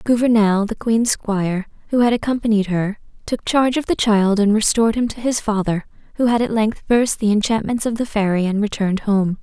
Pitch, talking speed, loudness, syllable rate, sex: 215 Hz, 205 wpm, -18 LUFS, 5.6 syllables/s, female